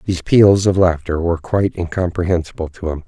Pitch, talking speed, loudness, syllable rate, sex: 85 Hz, 175 wpm, -16 LUFS, 6.3 syllables/s, male